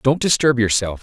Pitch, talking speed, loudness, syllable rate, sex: 125 Hz, 175 wpm, -17 LUFS, 5.1 syllables/s, male